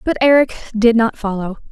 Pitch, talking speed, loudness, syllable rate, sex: 230 Hz, 175 wpm, -15 LUFS, 5.4 syllables/s, female